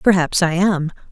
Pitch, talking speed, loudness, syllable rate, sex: 175 Hz, 160 wpm, -17 LUFS, 4.4 syllables/s, female